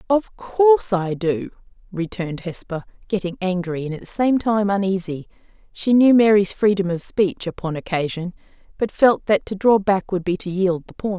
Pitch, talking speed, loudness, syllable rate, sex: 190 Hz, 180 wpm, -20 LUFS, 4.9 syllables/s, female